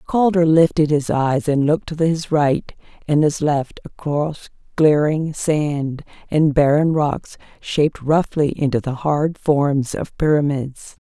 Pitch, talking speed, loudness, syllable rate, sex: 150 Hz, 140 wpm, -18 LUFS, 3.8 syllables/s, female